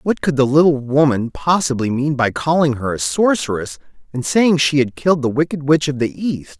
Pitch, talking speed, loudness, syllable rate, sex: 140 Hz, 210 wpm, -17 LUFS, 5.1 syllables/s, male